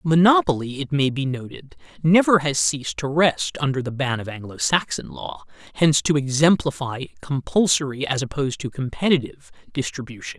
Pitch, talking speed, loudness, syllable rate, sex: 140 Hz, 150 wpm, -21 LUFS, 5.4 syllables/s, male